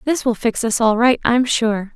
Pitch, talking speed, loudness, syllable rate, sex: 235 Hz, 245 wpm, -17 LUFS, 4.4 syllables/s, female